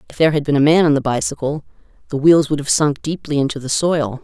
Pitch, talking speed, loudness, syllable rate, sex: 145 Hz, 255 wpm, -17 LUFS, 6.4 syllables/s, female